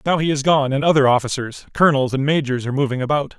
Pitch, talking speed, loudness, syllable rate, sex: 140 Hz, 230 wpm, -18 LUFS, 6.9 syllables/s, male